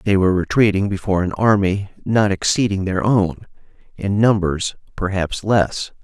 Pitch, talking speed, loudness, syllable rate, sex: 100 Hz, 140 wpm, -18 LUFS, 4.8 syllables/s, male